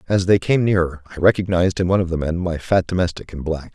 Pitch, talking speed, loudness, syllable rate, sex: 90 Hz, 255 wpm, -19 LUFS, 6.7 syllables/s, male